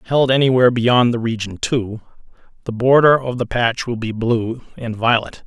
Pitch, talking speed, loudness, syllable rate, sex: 120 Hz, 175 wpm, -17 LUFS, 4.8 syllables/s, male